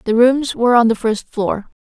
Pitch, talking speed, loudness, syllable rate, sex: 235 Hz, 230 wpm, -16 LUFS, 5.0 syllables/s, female